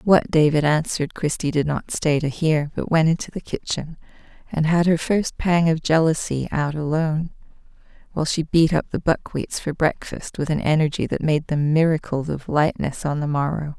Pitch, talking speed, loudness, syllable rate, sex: 155 Hz, 185 wpm, -21 LUFS, 5.1 syllables/s, female